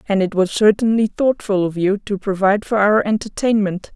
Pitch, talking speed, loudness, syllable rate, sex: 205 Hz, 180 wpm, -17 LUFS, 5.3 syllables/s, female